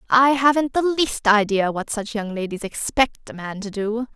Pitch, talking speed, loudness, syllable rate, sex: 230 Hz, 200 wpm, -21 LUFS, 4.6 syllables/s, female